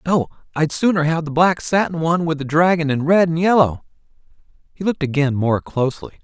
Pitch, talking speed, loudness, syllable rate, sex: 155 Hz, 190 wpm, -18 LUFS, 5.9 syllables/s, male